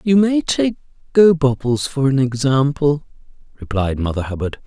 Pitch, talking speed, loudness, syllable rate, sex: 135 Hz, 130 wpm, -17 LUFS, 4.7 syllables/s, male